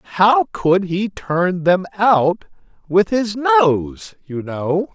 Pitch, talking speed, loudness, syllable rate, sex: 185 Hz, 135 wpm, -17 LUFS, 2.8 syllables/s, male